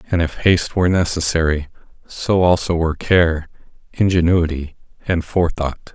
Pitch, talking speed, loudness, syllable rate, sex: 85 Hz, 120 wpm, -18 LUFS, 5.2 syllables/s, male